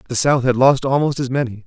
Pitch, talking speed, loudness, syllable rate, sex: 130 Hz, 255 wpm, -17 LUFS, 6.1 syllables/s, male